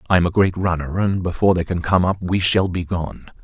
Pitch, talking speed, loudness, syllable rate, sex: 90 Hz, 260 wpm, -19 LUFS, 5.8 syllables/s, male